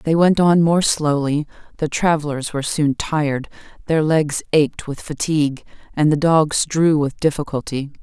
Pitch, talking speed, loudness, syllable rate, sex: 150 Hz, 155 wpm, -18 LUFS, 4.6 syllables/s, female